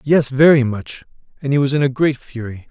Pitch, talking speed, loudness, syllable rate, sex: 135 Hz, 220 wpm, -16 LUFS, 5.3 syllables/s, male